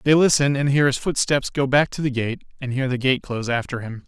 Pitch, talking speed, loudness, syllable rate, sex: 135 Hz, 265 wpm, -21 LUFS, 5.8 syllables/s, male